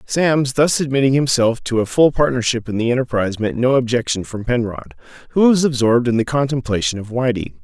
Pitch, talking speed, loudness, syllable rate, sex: 125 Hz, 190 wpm, -17 LUFS, 5.8 syllables/s, male